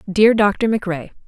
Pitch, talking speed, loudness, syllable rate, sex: 200 Hz, 140 wpm, -17 LUFS, 4.0 syllables/s, female